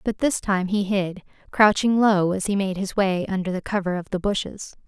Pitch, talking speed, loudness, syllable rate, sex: 195 Hz, 220 wpm, -22 LUFS, 5.0 syllables/s, female